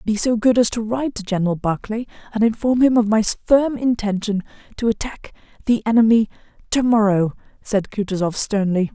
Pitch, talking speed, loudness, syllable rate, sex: 220 Hz, 160 wpm, -19 LUFS, 5.5 syllables/s, female